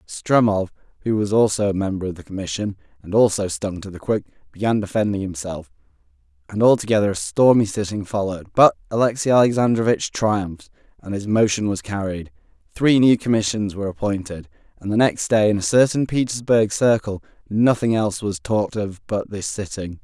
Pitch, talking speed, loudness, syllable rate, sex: 105 Hz, 165 wpm, -20 LUFS, 5.6 syllables/s, male